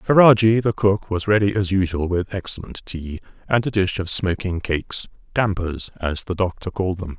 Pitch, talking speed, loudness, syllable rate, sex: 95 Hz, 185 wpm, -21 LUFS, 5.1 syllables/s, male